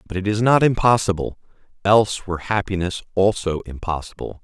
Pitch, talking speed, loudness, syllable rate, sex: 100 Hz, 135 wpm, -20 LUFS, 5.8 syllables/s, male